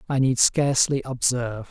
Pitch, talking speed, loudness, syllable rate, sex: 130 Hz, 140 wpm, -21 LUFS, 5.3 syllables/s, male